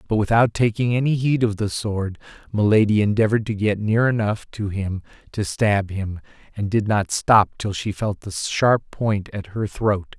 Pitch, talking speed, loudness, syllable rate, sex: 105 Hz, 190 wpm, -21 LUFS, 4.5 syllables/s, male